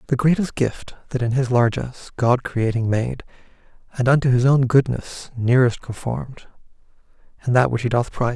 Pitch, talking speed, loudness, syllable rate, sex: 125 Hz, 165 wpm, -20 LUFS, 5.3 syllables/s, male